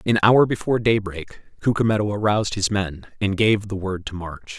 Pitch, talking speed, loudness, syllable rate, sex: 100 Hz, 185 wpm, -21 LUFS, 5.4 syllables/s, male